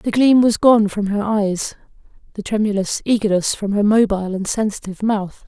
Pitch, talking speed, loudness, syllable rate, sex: 210 Hz, 175 wpm, -18 LUFS, 5.2 syllables/s, female